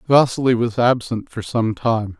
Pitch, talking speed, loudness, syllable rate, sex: 115 Hz, 165 wpm, -19 LUFS, 4.4 syllables/s, male